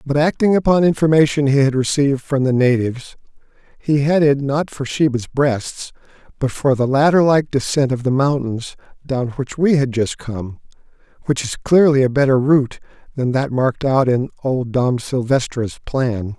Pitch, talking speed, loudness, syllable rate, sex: 135 Hz, 170 wpm, -17 LUFS, 4.9 syllables/s, male